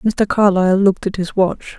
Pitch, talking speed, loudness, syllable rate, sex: 195 Hz, 200 wpm, -16 LUFS, 5.1 syllables/s, female